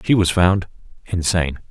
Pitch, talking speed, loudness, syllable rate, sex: 90 Hz, 140 wpm, -19 LUFS, 5.5 syllables/s, male